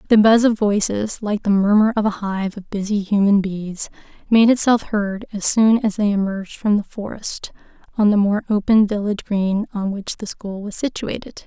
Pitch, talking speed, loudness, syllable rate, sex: 205 Hz, 195 wpm, -19 LUFS, 5.0 syllables/s, female